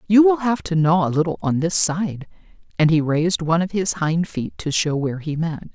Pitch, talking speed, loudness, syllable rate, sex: 170 Hz, 240 wpm, -20 LUFS, 5.4 syllables/s, female